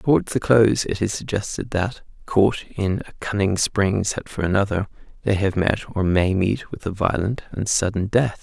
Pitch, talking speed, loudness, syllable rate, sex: 100 Hz, 190 wpm, -22 LUFS, 4.7 syllables/s, male